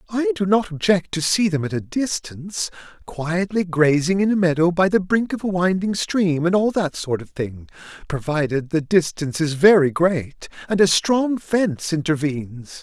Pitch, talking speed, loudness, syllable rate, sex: 175 Hz, 180 wpm, -20 LUFS, 4.7 syllables/s, male